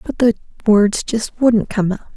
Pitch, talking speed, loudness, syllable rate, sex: 215 Hz, 165 wpm, -17 LUFS, 3.8 syllables/s, female